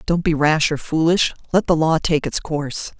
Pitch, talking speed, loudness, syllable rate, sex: 155 Hz, 220 wpm, -19 LUFS, 4.9 syllables/s, female